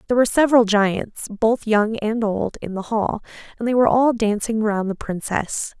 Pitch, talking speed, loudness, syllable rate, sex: 220 Hz, 195 wpm, -20 LUFS, 5.1 syllables/s, female